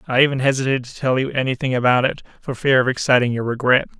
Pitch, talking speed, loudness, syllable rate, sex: 130 Hz, 240 wpm, -18 LUFS, 7.0 syllables/s, male